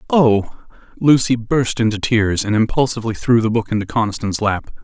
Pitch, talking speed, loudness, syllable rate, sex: 115 Hz, 160 wpm, -17 LUFS, 5.3 syllables/s, male